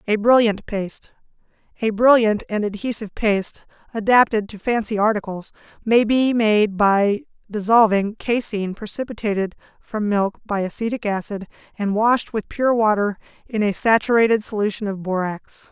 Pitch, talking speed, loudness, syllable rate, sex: 215 Hz, 130 wpm, -20 LUFS, 4.9 syllables/s, female